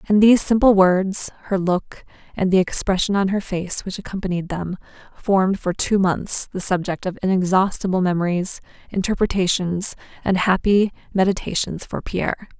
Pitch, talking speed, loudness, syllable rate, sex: 190 Hz, 145 wpm, -20 LUFS, 5.1 syllables/s, female